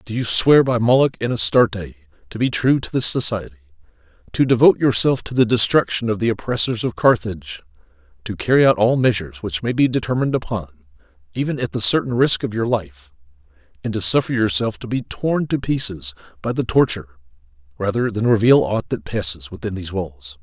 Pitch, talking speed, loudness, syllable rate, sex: 105 Hz, 185 wpm, -18 LUFS, 5.9 syllables/s, male